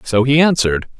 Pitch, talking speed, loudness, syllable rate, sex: 130 Hz, 180 wpm, -14 LUFS, 6.2 syllables/s, male